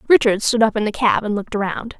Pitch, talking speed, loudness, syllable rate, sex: 215 Hz, 270 wpm, -18 LUFS, 6.7 syllables/s, female